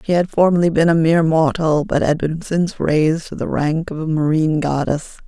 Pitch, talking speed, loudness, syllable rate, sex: 160 Hz, 215 wpm, -17 LUFS, 5.7 syllables/s, female